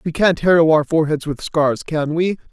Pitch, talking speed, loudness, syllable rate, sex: 160 Hz, 215 wpm, -17 LUFS, 5.2 syllables/s, male